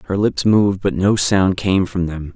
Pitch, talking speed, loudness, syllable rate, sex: 95 Hz, 230 wpm, -17 LUFS, 4.6 syllables/s, male